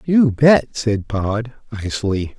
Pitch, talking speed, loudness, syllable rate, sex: 115 Hz, 125 wpm, -18 LUFS, 3.4 syllables/s, male